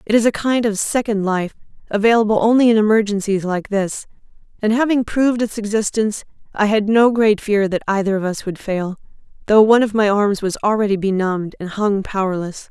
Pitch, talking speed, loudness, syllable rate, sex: 210 Hz, 190 wpm, -17 LUFS, 5.7 syllables/s, female